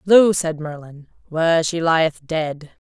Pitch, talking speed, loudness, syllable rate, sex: 160 Hz, 145 wpm, -19 LUFS, 3.7 syllables/s, female